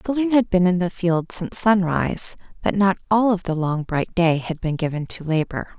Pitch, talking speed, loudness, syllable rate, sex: 180 Hz, 230 wpm, -20 LUFS, 5.3 syllables/s, female